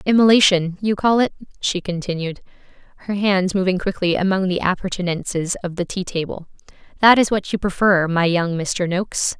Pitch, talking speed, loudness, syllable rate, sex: 185 Hz, 165 wpm, -19 LUFS, 5.4 syllables/s, female